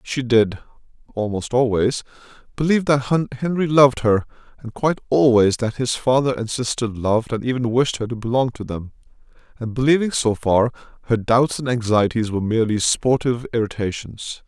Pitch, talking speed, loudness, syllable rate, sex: 120 Hz, 150 wpm, -20 LUFS, 5.4 syllables/s, male